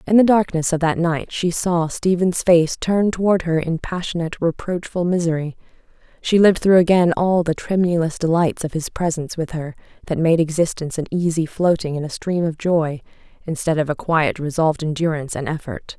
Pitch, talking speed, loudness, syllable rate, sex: 165 Hz, 185 wpm, -19 LUFS, 5.5 syllables/s, female